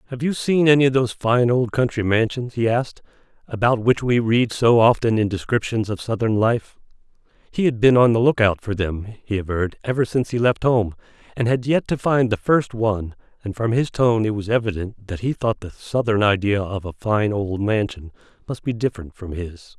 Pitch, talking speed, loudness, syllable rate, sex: 115 Hz, 210 wpm, -20 LUFS, 5.4 syllables/s, male